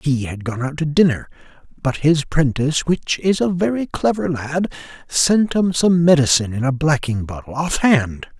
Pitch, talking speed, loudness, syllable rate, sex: 145 Hz, 170 wpm, -18 LUFS, 4.1 syllables/s, male